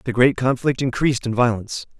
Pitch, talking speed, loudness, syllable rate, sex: 125 Hz, 180 wpm, -20 LUFS, 6.3 syllables/s, male